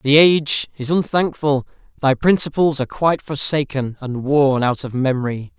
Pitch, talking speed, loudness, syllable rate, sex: 140 Hz, 150 wpm, -18 LUFS, 4.9 syllables/s, male